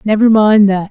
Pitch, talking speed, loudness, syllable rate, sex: 210 Hz, 200 wpm, -10 LUFS, 4.7 syllables/s, female